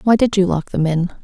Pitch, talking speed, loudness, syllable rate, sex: 190 Hz, 290 wpm, -17 LUFS, 5.6 syllables/s, female